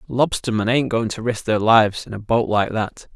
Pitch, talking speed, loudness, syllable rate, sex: 115 Hz, 230 wpm, -19 LUFS, 5.1 syllables/s, male